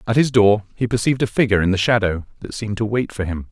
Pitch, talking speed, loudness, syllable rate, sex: 110 Hz, 275 wpm, -19 LUFS, 7.1 syllables/s, male